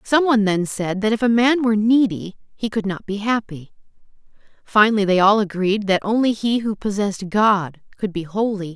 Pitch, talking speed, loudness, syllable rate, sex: 210 Hz, 190 wpm, -19 LUFS, 5.5 syllables/s, female